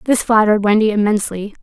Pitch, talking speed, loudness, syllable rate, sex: 215 Hz, 150 wpm, -15 LUFS, 6.9 syllables/s, female